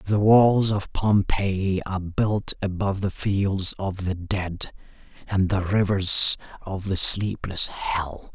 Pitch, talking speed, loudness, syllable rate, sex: 95 Hz, 135 wpm, -22 LUFS, 3.5 syllables/s, male